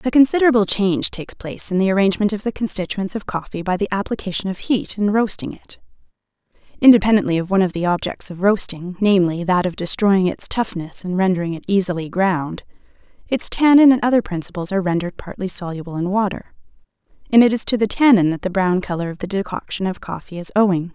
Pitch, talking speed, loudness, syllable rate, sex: 195 Hz, 195 wpm, -19 LUFS, 6.4 syllables/s, female